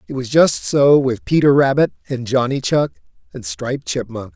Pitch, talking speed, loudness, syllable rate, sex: 125 Hz, 180 wpm, -17 LUFS, 4.9 syllables/s, male